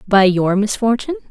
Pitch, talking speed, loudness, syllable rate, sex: 215 Hz, 140 wpm, -16 LUFS, 5.9 syllables/s, female